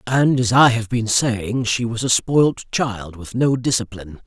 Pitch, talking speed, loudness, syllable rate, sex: 115 Hz, 195 wpm, -18 LUFS, 4.2 syllables/s, male